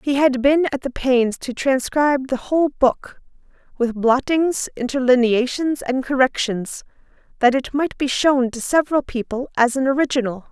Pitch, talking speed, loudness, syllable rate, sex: 260 Hz, 155 wpm, -19 LUFS, 4.7 syllables/s, female